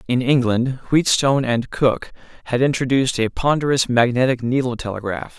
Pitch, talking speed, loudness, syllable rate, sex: 125 Hz, 135 wpm, -19 LUFS, 5.3 syllables/s, male